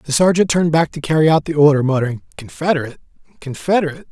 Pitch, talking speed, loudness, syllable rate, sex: 150 Hz, 175 wpm, -16 LUFS, 7.4 syllables/s, male